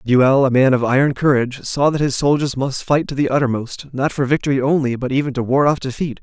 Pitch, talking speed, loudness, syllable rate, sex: 135 Hz, 240 wpm, -17 LUFS, 6.0 syllables/s, male